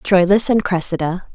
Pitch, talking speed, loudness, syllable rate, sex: 185 Hz, 135 wpm, -16 LUFS, 4.7 syllables/s, female